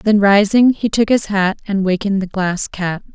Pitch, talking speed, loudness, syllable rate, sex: 200 Hz, 210 wpm, -16 LUFS, 4.8 syllables/s, female